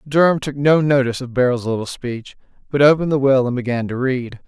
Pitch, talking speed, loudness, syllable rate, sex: 130 Hz, 215 wpm, -18 LUFS, 6.1 syllables/s, male